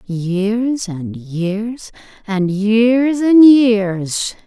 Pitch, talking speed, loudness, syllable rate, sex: 210 Hz, 95 wpm, -15 LUFS, 1.8 syllables/s, female